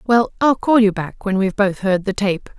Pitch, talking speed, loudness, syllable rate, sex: 205 Hz, 255 wpm, -18 LUFS, 5.2 syllables/s, female